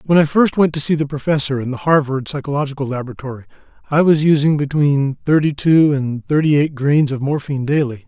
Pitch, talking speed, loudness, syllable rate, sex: 145 Hz, 195 wpm, -16 LUFS, 5.9 syllables/s, male